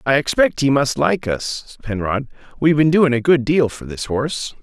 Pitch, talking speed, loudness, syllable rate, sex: 135 Hz, 210 wpm, -18 LUFS, 4.7 syllables/s, male